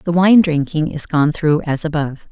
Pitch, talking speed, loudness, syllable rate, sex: 160 Hz, 205 wpm, -16 LUFS, 5.0 syllables/s, female